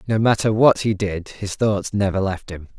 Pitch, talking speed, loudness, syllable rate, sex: 100 Hz, 215 wpm, -20 LUFS, 4.7 syllables/s, male